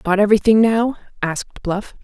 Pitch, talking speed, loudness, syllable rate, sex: 205 Hz, 150 wpm, -17 LUFS, 5.3 syllables/s, female